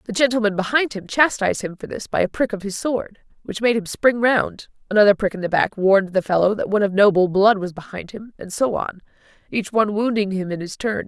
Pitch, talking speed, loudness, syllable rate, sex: 205 Hz, 245 wpm, -20 LUFS, 5.9 syllables/s, female